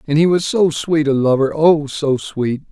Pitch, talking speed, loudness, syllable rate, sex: 150 Hz, 220 wpm, -16 LUFS, 4.4 syllables/s, male